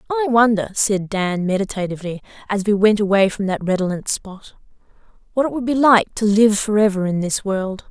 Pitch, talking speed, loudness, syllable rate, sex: 205 Hz, 190 wpm, -18 LUFS, 5.4 syllables/s, female